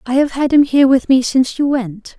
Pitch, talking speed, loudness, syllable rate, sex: 260 Hz, 275 wpm, -14 LUFS, 5.8 syllables/s, female